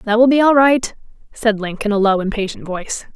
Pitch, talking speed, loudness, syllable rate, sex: 225 Hz, 230 wpm, -16 LUFS, 5.6 syllables/s, female